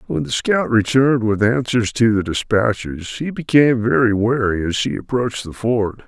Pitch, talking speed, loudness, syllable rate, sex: 115 Hz, 180 wpm, -18 LUFS, 4.9 syllables/s, male